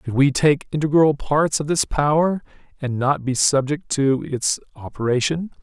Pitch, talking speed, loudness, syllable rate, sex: 140 Hz, 160 wpm, -20 LUFS, 4.5 syllables/s, male